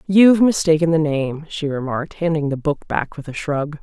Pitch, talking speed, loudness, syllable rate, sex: 155 Hz, 205 wpm, -19 LUFS, 5.2 syllables/s, female